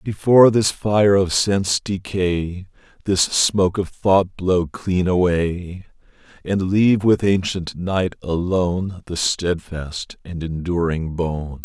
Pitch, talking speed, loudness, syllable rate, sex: 90 Hz, 125 wpm, -19 LUFS, 3.6 syllables/s, male